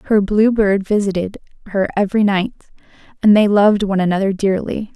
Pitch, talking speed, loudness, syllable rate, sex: 200 Hz, 155 wpm, -16 LUFS, 6.0 syllables/s, female